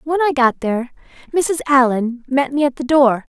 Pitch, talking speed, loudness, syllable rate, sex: 270 Hz, 195 wpm, -17 LUFS, 4.7 syllables/s, female